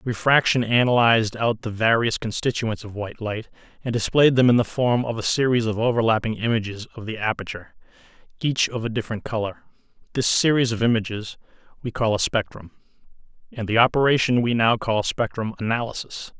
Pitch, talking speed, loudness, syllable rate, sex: 115 Hz, 165 wpm, -22 LUFS, 5.8 syllables/s, male